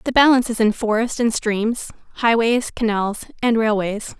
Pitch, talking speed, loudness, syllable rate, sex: 225 Hz, 155 wpm, -19 LUFS, 4.8 syllables/s, female